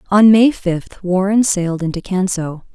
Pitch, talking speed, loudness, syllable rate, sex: 190 Hz, 155 wpm, -15 LUFS, 4.5 syllables/s, female